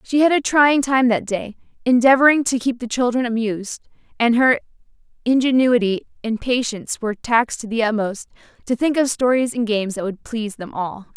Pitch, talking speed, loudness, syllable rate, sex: 240 Hz, 185 wpm, -19 LUFS, 5.6 syllables/s, female